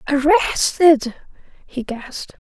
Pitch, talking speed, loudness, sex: 285 Hz, 75 wpm, -17 LUFS, female